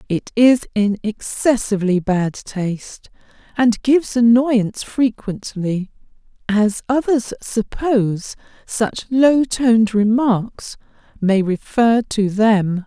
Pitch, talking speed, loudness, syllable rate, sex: 220 Hz, 100 wpm, -17 LUFS, 3.5 syllables/s, female